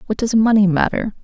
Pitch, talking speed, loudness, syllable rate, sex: 210 Hz, 195 wpm, -16 LUFS, 5.9 syllables/s, female